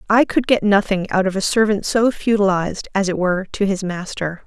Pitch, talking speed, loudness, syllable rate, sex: 200 Hz, 215 wpm, -18 LUFS, 5.5 syllables/s, female